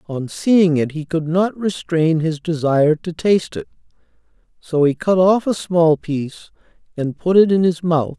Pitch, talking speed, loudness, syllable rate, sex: 165 Hz, 185 wpm, -17 LUFS, 4.6 syllables/s, male